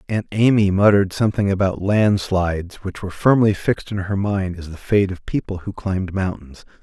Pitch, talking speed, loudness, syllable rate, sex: 100 Hz, 185 wpm, -19 LUFS, 5.4 syllables/s, male